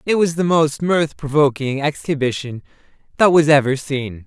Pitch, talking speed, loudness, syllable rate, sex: 145 Hz, 155 wpm, -17 LUFS, 4.7 syllables/s, male